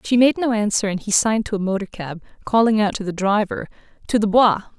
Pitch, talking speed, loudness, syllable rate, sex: 210 Hz, 240 wpm, -19 LUFS, 6.2 syllables/s, female